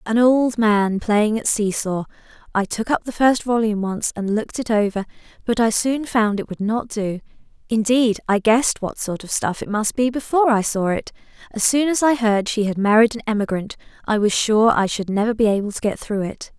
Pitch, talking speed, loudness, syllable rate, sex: 220 Hz, 225 wpm, -19 LUFS, 5.3 syllables/s, female